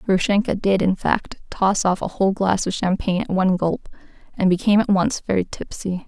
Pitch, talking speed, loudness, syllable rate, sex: 190 Hz, 200 wpm, -20 LUFS, 5.5 syllables/s, female